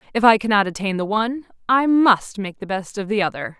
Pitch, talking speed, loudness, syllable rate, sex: 210 Hz, 235 wpm, -19 LUFS, 5.8 syllables/s, female